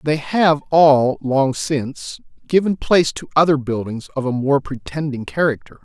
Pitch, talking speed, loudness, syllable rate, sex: 140 Hz, 155 wpm, -18 LUFS, 4.6 syllables/s, male